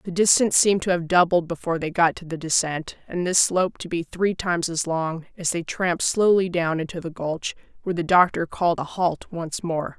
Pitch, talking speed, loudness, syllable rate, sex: 170 Hz, 220 wpm, -22 LUFS, 5.6 syllables/s, female